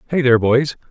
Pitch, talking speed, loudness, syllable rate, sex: 130 Hz, 200 wpm, -15 LUFS, 6.9 syllables/s, male